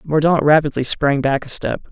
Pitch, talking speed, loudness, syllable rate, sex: 145 Hz, 190 wpm, -17 LUFS, 5.1 syllables/s, male